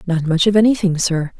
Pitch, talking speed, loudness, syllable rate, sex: 180 Hz, 215 wpm, -16 LUFS, 5.7 syllables/s, female